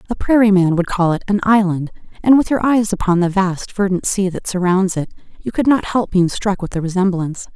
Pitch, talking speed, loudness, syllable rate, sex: 195 Hz, 230 wpm, -16 LUFS, 5.6 syllables/s, female